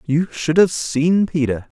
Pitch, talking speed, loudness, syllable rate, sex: 160 Hz, 170 wpm, -18 LUFS, 3.7 syllables/s, male